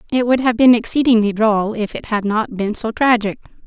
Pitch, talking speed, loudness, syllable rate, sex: 225 Hz, 215 wpm, -16 LUFS, 5.3 syllables/s, female